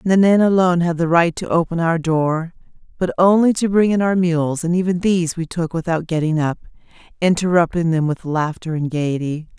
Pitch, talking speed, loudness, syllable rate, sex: 170 Hz, 190 wpm, -18 LUFS, 5.4 syllables/s, female